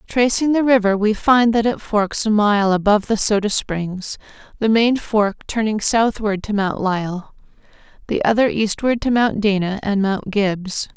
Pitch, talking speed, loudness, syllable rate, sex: 210 Hz, 170 wpm, -18 LUFS, 4.3 syllables/s, female